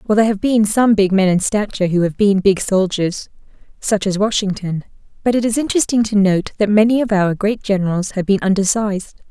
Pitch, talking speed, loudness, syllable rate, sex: 200 Hz, 195 wpm, -16 LUFS, 5.9 syllables/s, female